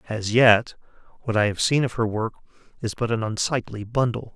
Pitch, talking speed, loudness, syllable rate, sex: 115 Hz, 195 wpm, -23 LUFS, 5.2 syllables/s, male